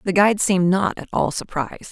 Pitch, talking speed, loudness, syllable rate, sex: 180 Hz, 220 wpm, -20 LUFS, 6.1 syllables/s, female